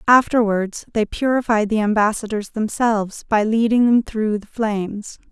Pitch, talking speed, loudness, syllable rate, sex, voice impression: 220 Hz, 135 wpm, -19 LUFS, 4.6 syllables/s, female, feminine, middle-aged, relaxed, bright, soft, slightly muffled, intellectual, friendly, reassuring, elegant, lively, kind